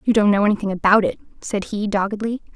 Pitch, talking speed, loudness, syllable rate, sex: 210 Hz, 210 wpm, -20 LUFS, 6.6 syllables/s, female